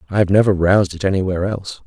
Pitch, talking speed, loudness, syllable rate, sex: 95 Hz, 225 wpm, -17 LUFS, 8.0 syllables/s, male